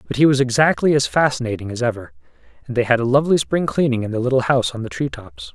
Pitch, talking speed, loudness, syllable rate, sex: 125 Hz, 250 wpm, -18 LUFS, 7.0 syllables/s, male